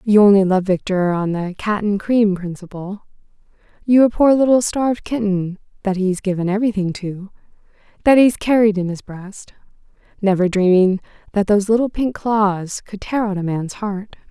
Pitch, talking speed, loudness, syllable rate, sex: 200 Hz, 165 wpm, -18 LUFS, 5.0 syllables/s, female